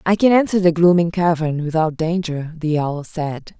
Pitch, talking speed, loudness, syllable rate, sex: 165 Hz, 185 wpm, -18 LUFS, 4.7 syllables/s, female